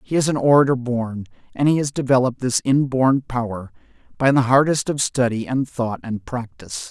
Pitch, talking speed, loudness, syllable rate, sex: 130 Hz, 175 wpm, -20 LUFS, 5.1 syllables/s, male